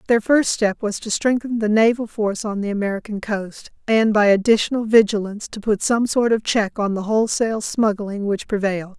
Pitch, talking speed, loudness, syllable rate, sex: 215 Hz, 195 wpm, -19 LUFS, 5.4 syllables/s, female